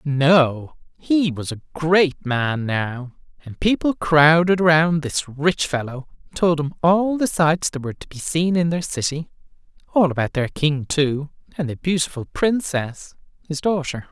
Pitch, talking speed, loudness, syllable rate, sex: 155 Hz, 160 wpm, -20 LUFS, 4.2 syllables/s, male